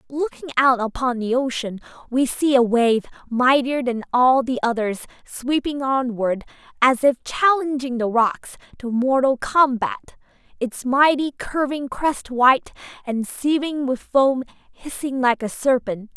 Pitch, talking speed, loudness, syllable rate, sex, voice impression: 255 Hz, 135 wpm, -20 LUFS, 4.1 syllables/s, female, feminine, adult-like, tensed, powerful, slightly bright, raspy, friendly, slightly unique, lively, intense